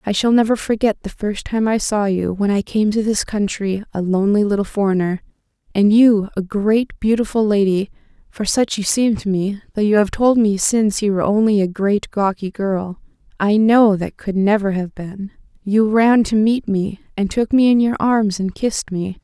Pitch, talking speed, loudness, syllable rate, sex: 205 Hz, 195 wpm, -17 LUFS, 5.0 syllables/s, female